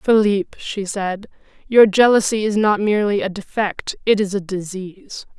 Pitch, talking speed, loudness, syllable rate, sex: 200 Hz, 155 wpm, -18 LUFS, 4.7 syllables/s, female